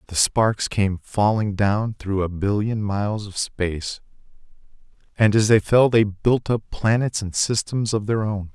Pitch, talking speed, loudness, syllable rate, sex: 105 Hz, 170 wpm, -21 LUFS, 4.2 syllables/s, male